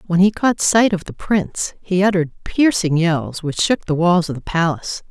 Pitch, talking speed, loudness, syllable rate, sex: 180 Hz, 210 wpm, -18 LUFS, 5.1 syllables/s, female